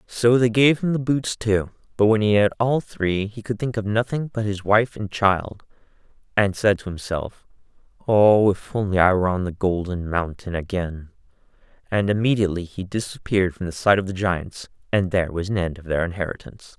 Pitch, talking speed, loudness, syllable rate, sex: 100 Hz, 195 wpm, -22 LUFS, 5.3 syllables/s, male